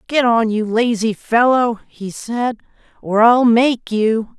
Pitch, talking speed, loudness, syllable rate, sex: 230 Hz, 150 wpm, -16 LUFS, 3.5 syllables/s, female